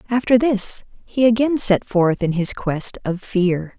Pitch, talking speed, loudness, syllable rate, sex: 205 Hz, 175 wpm, -18 LUFS, 3.9 syllables/s, female